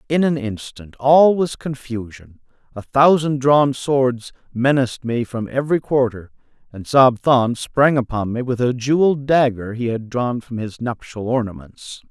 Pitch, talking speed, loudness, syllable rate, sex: 125 Hz, 160 wpm, -18 LUFS, 4.4 syllables/s, male